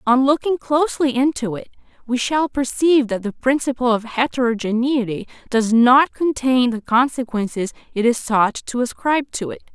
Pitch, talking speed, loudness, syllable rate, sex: 250 Hz, 155 wpm, -19 LUFS, 5.0 syllables/s, female